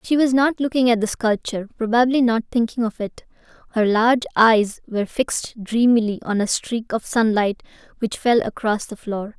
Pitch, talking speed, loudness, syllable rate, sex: 230 Hz, 180 wpm, -20 LUFS, 5.1 syllables/s, female